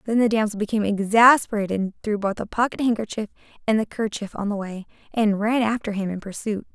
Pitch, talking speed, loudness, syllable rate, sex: 215 Hz, 205 wpm, -22 LUFS, 6.2 syllables/s, female